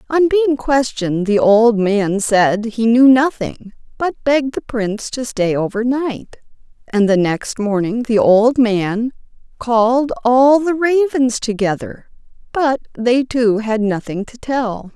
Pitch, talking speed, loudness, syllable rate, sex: 235 Hz, 145 wpm, -16 LUFS, 3.8 syllables/s, female